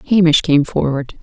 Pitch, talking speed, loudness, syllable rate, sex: 155 Hz, 145 wpm, -14 LUFS, 5.0 syllables/s, female